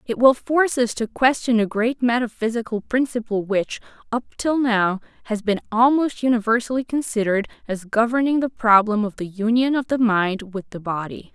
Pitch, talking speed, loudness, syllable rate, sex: 230 Hz, 170 wpm, -21 LUFS, 5.2 syllables/s, female